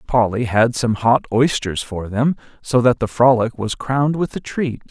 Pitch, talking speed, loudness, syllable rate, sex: 120 Hz, 195 wpm, -18 LUFS, 4.6 syllables/s, male